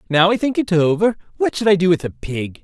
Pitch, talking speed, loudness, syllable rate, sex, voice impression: 185 Hz, 275 wpm, -18 LUFS, 5.9 syllables/s, male, masculine, adult-like, refreshing, slightly sincere, slightly lively